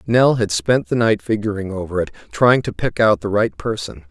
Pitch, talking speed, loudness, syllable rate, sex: 105 Hz, 220 wpm, -18 LUFS, 5.1 syllables/s, male